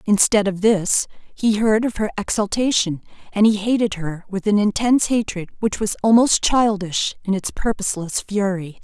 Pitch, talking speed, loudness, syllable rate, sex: 205 Hz, 165 wpm, -19 LUFS, 4.8 syllables/s, female